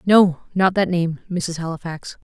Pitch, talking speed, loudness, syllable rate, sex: 175 Hz, 130 wpm, -20 LUFS, 4.2 syllables/s, female